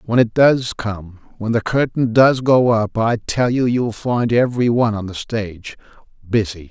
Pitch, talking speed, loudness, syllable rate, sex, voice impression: 115 Hz, 180 wpm, -17 LUFS, 4.6 syllables/s, male, masculine, middle-aged, thick, tensed, slightly powerful, calm, mature, slightly friendly, reassuring, wild, kind, slightly sharp